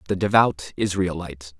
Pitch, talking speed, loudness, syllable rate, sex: 90 Hz, 115 wpm, -22 LUFS, 5.2 syllables/s, male